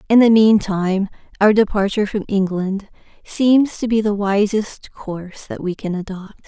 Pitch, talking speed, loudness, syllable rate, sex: 205 Hz, 155 wpm, -18 LUFS, 4.9 syllables/s, female